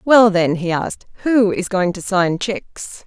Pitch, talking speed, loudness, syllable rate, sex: 195 Hz, 195 wpm, -17 LUFS, 4.3 syllables/s, female